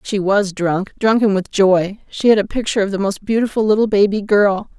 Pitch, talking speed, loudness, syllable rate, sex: 200 Hz, 215 wpm, -16 LUFS, 5.4 syllables/s, female